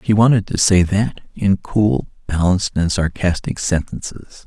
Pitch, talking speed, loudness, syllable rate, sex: 95 Hz, 150 wpm, -18 LUFS, 4.5 syllables/s, male